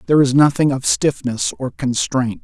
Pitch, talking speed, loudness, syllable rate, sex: 135 Hz, 170 wpm, -17 LUFS, 5.0 syllables/s, male